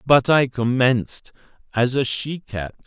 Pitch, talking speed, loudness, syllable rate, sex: 125 Hz, 145 wpm, -20 LUFS, 4.0 syllables/s, male